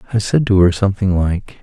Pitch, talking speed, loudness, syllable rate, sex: 100 Hz, 220 wpm, -15 LUFS, 6.0 syllables/s, male